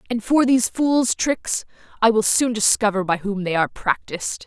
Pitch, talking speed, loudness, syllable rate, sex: 220 Hz, 175 wpm, -20 LUFS, 5.1 syllables/s, female